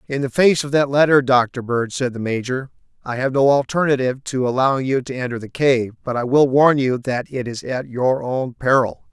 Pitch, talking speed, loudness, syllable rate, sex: 130 Hz, 225 wpm, -19 LUFS, 5.2 syllables/s, male